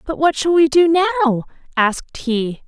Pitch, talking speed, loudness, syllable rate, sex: 275 Hz, 180 wpm, -17 LUFS, 5.0 syllables/s, female